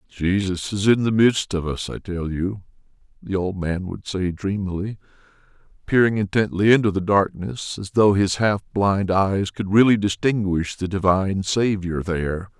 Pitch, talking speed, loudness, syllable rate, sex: 95 Hz, 160 wpm, -21 LUFS, 4.6 syllables/s, male